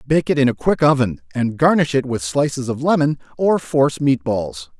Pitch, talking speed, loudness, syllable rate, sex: 135 Hz, 215 wpm, -18 LUFS, 5.2 syllables/s, male